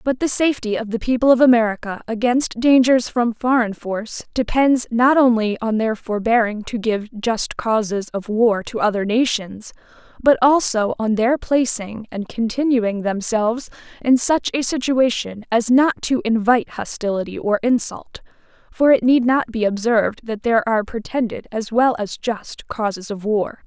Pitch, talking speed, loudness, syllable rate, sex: 230 Hz, 160 wpm, -19 LUFS, 4.7 syllables/s, female